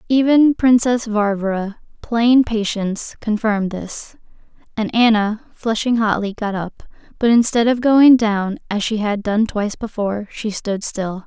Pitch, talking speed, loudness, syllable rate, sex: 220 Hz, 145 wpm, -17 LUFS, 4.4 syllables/s, female